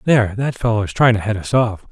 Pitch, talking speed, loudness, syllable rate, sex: 110 Hz, 285 wpm, -17 LUFS, 6.4 syllables/s, male